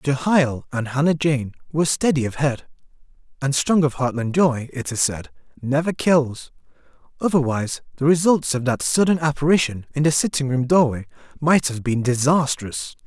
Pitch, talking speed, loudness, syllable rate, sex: 140 Hz, 155 wpm, -20 LUFS, 5.0 syllables/s, male